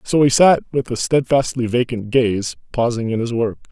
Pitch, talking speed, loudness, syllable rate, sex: 125 Hz, 195 wpm, -18 LUFS, 4.9 syllables/s, male